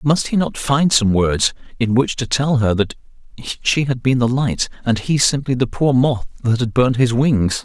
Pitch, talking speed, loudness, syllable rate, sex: 125 Hz, 220 wpm, -17 LUFS, 4.8 syllables/s, male